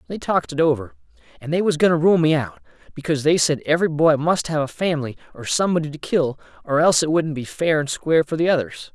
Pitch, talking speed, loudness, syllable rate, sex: 155 Hz, 240 wpm, -20 LUFS, 6.7 syllables/s, male